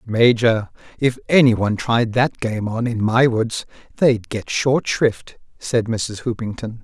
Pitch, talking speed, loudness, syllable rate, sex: 115 Hz, 160 wpm, -19 LUFS, 4.0 syllables/s, male